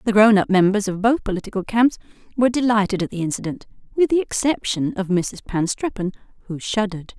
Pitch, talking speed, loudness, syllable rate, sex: 210 Hz, 165 wpm, -20 LUFS, 6.1 syllables/s, female